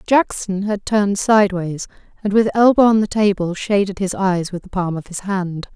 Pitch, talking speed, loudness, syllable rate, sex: 195 Hz, 200 wpm, -18 LUFS, 5.0 syllables/s, female